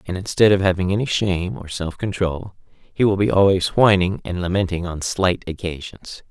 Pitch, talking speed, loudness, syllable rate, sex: 95 Hz, 180 wpm, -20 LUFS, 5.0 syllables/s, male